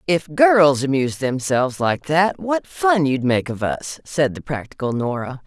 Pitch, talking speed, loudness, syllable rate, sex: 145 Hz, 175 wpm, -19 LUFS, 4.4 syllables/s, female